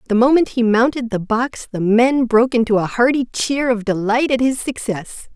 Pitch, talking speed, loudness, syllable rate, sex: 235 Hz, 200 wpm, -17 LUFS, 5.2 syllables/s, female